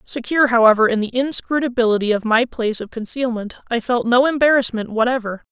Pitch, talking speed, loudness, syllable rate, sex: 240 Hz, 165 wpm, -18 LUFS, 6.1 syllables/s, female